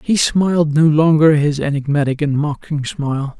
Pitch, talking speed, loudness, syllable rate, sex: 150 Hz, 160 wpm, -16 LUFS, 4.9 syllables/s, male